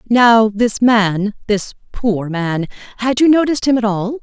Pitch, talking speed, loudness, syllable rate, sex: 220 Hz, 170 wpm, -15 LUFS, 4.1 syllables/s, female